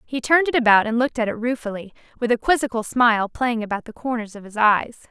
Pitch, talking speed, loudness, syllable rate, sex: 235 Hz, 235 wpm, -20 LUFS, 6.4 syllables/s, female